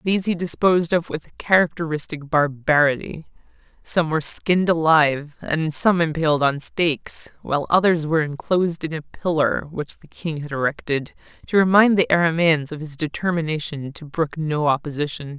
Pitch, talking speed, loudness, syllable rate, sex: 160 Hz, 150 wpm, -20 LUFS, 5.2 syllables/s, female